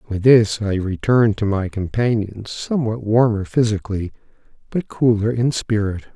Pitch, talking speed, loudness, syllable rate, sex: 110 Hz, 135 wpm, -19 LUFS, 4.9 syllables/s, male